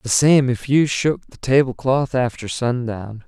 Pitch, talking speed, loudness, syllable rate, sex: 125 Hz, 185 wpm, -19 LUFS, 4.0 syllables/s, male